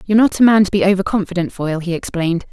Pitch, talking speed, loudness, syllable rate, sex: 190 Hz, 260 wpm, -16 LUFS, 7.7 syllables/s, female